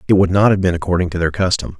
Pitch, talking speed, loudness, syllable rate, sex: 90 Hz, 300 wpm, -16 LUFS, 7.5 syllables/s, male